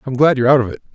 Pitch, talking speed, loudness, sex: 130 Hz, 380 wpm, -14 LUFS, male